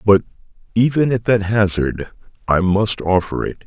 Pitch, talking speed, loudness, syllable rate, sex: 105 Hz, 145 wpm, -18 LUFS, 4.5 syllables/s, male